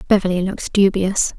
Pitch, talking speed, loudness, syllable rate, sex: 190 Hz, 130 wpm, -18 LUFS, 5.8 syllables/s, female